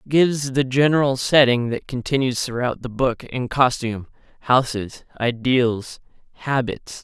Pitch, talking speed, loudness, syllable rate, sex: 125 Hz, 130 wpm, -20 LUFS, 4.5 syllables/s, male